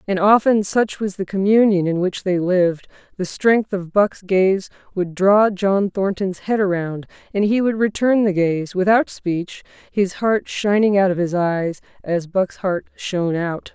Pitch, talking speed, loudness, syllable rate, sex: 195 Hz, 180 wpm, -19 LUFS, 4.2 syllables/s, female